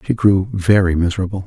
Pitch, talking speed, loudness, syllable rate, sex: 95 Hz, 165 wpm, -16 LUFS, 6.2 syllables/s, male